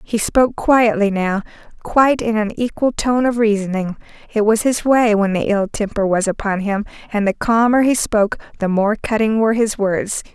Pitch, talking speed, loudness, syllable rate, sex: 215 Hz, 190 wpm, -17 LUFS, 5.1 syllables/s, female